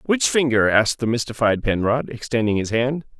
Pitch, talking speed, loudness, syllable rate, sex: 120 Hz, 170 wpm, -20 LUFS, 5.5 syllables/s, male